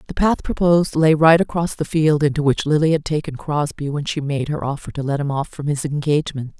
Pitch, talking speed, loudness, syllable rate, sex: 150 Hz, 235 wpm, -19 LUFS, 5.6 syllables/s, female